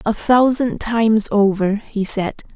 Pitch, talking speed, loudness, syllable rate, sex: 215 Hz, 140 wpm, -17 LUFS, 3.9 syllables/s, female